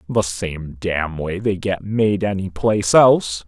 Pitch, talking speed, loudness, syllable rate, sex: 95 Hz, 170 wpm, -19 LUFS, 4.0 syllables/s, male